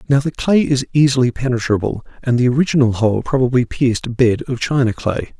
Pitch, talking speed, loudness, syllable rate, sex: 125 Hz, 190 wpm, -17 LUFS, 5.9 syllables/s, male